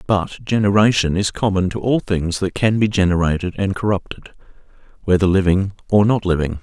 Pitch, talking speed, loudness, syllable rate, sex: 95 Hz, 165 wpm, -18 LUFS, 5.5 syllables/s, male